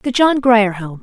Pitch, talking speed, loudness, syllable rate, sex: 230 Hz, 235 wpm, -14 LUFS, 4.0 syllables/s, female